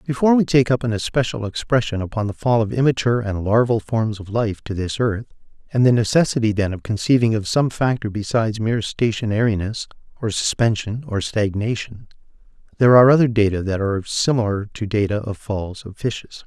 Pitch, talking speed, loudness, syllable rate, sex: 110 Hz, 180 wpm, -20 LUFS, 5.8 syllables/s, male